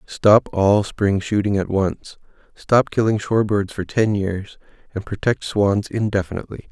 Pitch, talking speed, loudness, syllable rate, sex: 100 Hz, 150 wpm, -19 LUFS, 4.5 syllables/s, male